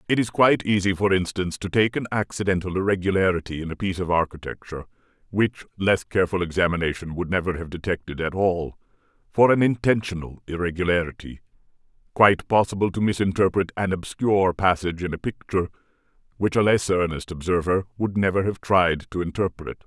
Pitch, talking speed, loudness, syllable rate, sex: 95 Hz, 155 wpm, -23 LUFS, 6.1 syllables/s, male